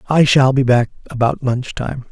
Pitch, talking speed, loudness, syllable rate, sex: 130 Hz, 200 wpm, -16 LUFS, 4.7 syllables/s, male